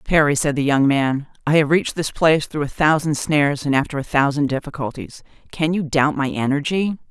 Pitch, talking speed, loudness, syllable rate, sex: 145 Hz, 205 wpm, -19 LUFS, 5.6 syllables/s, female